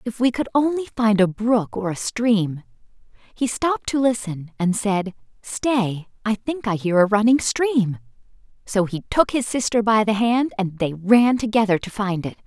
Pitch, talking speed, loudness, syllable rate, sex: 215 Hz, 190 wpm, -21 LUFS, 4.5 syllables/s, female